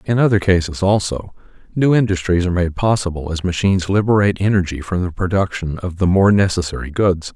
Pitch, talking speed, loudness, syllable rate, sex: 95 Hz, 170 wpm, -17 LUFS, 6.0 syllables/s, male